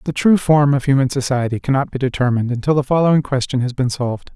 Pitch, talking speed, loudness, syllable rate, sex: 135 Hz, 220 wpm, -17 LUFS, 6.7 syllables/s, male